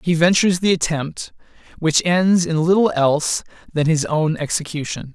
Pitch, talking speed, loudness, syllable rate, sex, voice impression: 165 Hz, 150 wpm, -18 LUFS, 4.9 syllables/s, male, masculine, adult-like, slightly clear, slightly unique, slightly lively